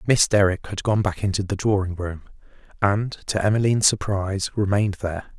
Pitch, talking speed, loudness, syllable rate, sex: 100 Hz, 165 wpm, -22 LUFS, 5.8 syllables/s, male